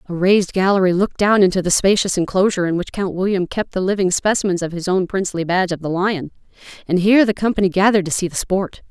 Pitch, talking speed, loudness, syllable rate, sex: 190 Hz, 230 wpm, -17 LUFS, 6.7 syllables/s, female